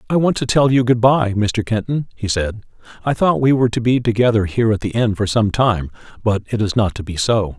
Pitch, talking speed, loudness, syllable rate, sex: 115 Hz, 255 wpm, -17 LUFS, 5.6 syllables/s, male